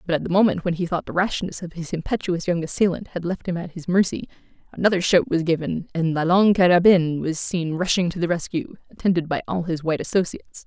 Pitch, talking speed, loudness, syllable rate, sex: 175 Hz, 225 wpm, -22 LUFS, 6.3 syllables/s, female